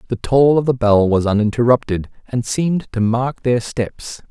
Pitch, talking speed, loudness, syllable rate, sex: 120 Hz, 180 wpm, -17 LUFS, 4.7 syllables/s, male